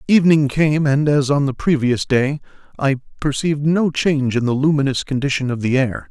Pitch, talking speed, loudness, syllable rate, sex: 140 Hz, 185 wpm, -18 LUFS, 5.5 syllables/s, male